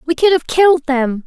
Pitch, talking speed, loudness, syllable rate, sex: 305 Hz, 235 wpm, -14 LUFS, 5.3 syllables/s, female